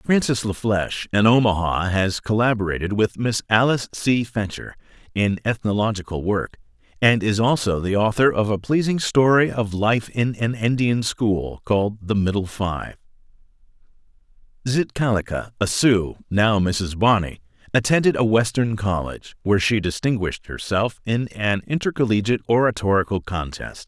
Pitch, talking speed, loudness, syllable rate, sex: 110 Hz, 135 wpm, -21 LUFS, 4.8 syllables/s, male